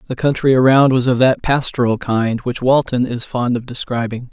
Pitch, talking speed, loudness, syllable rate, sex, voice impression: 125 Hz, 195 wpm, -16 LUFS, 5.1 syllables/s, male, masculine, adult-like, slightly clear, slightly fluent, slightly refreshing, sincere